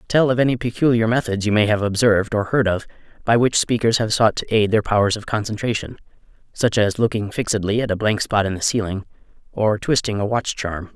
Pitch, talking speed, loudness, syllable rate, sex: 110 Hz, 215 wpm, -19 LUFS, 5.9 syllables/s, male